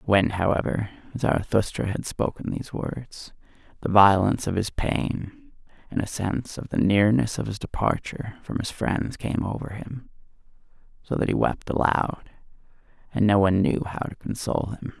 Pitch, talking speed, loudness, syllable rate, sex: 100 Hz, 160 wpm, -25 LUFS, 5.0 syllables/s, male